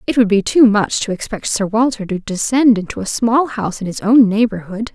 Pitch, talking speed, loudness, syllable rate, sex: 215 Hz, 230 wpm, -15 LUFS, 5.4 syllables/s, female